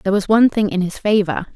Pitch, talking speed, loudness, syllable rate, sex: 200 Hz, 270 wpm, -17 LUFS, 6.9 syllables/s, female